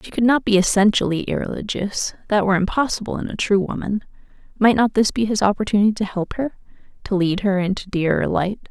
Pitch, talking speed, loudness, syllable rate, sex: 205 Hz, 180 wpm, -20 LUFS, 6.1 syllables/s, female